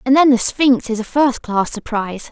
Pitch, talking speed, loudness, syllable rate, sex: 245 Hz, 210 wpm, -16 LUFS, 5.0 syllables/s, female